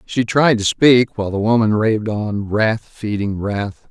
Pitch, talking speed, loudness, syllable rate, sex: 110 Hz, 185 wpm, -17 LUFS, 4.2 syllables/s, male